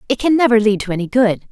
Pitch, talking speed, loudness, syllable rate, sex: 230 Hz, 275 wpm, -15 LUFS, 7.1 syllables/s, female